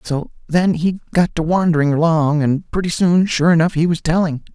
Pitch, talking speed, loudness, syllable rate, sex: 165 Hz, 200 wpm, -17 LUFS, 5.2 syllables/s, male